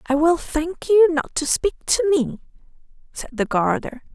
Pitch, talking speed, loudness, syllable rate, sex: 310 Hz, 175 wpm, -20 LUFS, 4.5 syllables/s, female